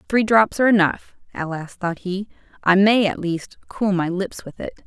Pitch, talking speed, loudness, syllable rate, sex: 190 Hz, 210 wpm, -20 LUFS, 4.8 syllables/s, female